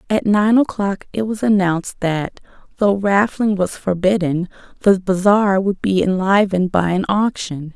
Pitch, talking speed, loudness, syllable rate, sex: 195 Hz, 145 wpm, -17 LUFS, 4.4 syllables/s, female